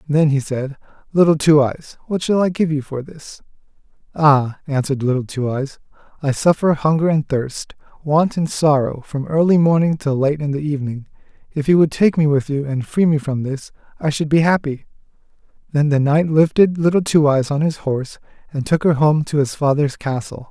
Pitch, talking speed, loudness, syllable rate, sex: 150 Hz, 200 wpm, -18 LUFS, 5.2 syllables/s, male